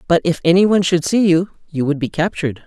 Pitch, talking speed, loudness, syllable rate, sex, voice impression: 170 Hz, 225 wpm, -16 LUFS, 6.2 syllables/s, female, very feminine, very adult-like, intellectual, elegant